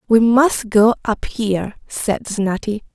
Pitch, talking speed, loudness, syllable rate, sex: 220 Hz, 145 wpm, -18 LUFS, 3.7 syllables/s, female